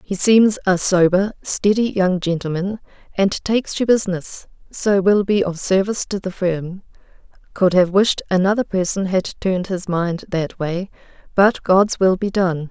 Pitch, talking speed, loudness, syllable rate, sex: 190 Hz, 165 wpm, -18 LUFS, 4.5 syllables/s, female